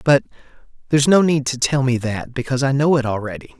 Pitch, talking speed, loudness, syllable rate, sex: 135 Hz, 200 wpm, -18 LUFS, 6.4 syllables/s, male